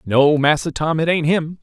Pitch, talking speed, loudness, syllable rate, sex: 155 Hz, 220 wpm, -17 LUFS, 4.6 syllables/s, male